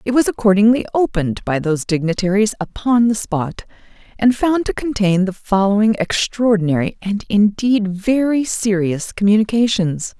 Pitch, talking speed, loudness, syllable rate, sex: 210 Hz, 130 wpm, -17 LUFS, 4.9 syllables/s, female